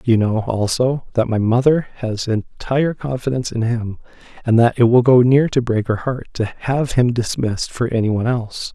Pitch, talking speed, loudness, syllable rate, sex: 120 Hz, 200 wpm, -18 LUFS, 5.1 syllables/s, male